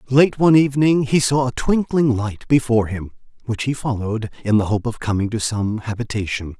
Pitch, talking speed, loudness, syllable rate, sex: 120 Hz, 190 wpm, -19 LUFS, 5.6 syllables/s, male